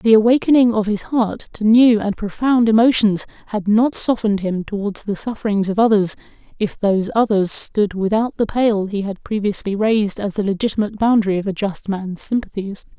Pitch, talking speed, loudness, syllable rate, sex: 210 Hz, 180 wpm, -18 LUFS, 5.4 syllables/s, female